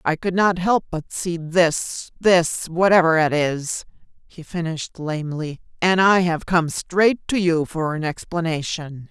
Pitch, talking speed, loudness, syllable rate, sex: 170 Hz, 145 wpm, -20 LUFS, 4.1 syllables/s, female